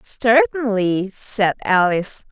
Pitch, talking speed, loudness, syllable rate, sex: 215 Hz, 80 wpm, -18 LUFS, 4.1 syllables/s, female